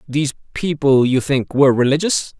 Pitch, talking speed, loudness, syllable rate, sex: 140 Hz, 150 wpm, -17 LUFS, 5.5 syllables/s, male